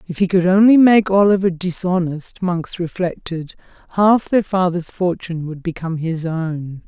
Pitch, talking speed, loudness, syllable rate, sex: 175 Hz, 150 wpm, -17 LUFS, 4.6 syllables/s, female